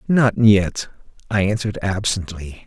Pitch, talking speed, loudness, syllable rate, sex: 100 Hz, 110 wpm, -19 LUFS, 4.3 syllables/s, male